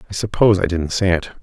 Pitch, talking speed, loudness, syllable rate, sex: 95 Hz, 255 wpm, -18 LUFS, 6.7 syllables/s, male